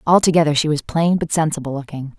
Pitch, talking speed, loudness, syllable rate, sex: 155 Hz, 190 wpm, -18 LUFS, 6.3 syllables/s, female